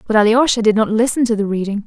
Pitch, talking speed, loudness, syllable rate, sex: 220 Hz, 255 wpm, -15 LUFS, 6.9 syllables/s, female